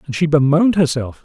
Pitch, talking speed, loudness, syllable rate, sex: 150 Hz, 195 wpm, -15 LUFS, 6.4 syllables/s, male